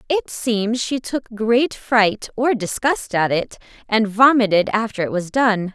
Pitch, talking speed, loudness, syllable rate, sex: 225 Hz, 165 wpm, -19 LUFS, 3.9 syllables/s, female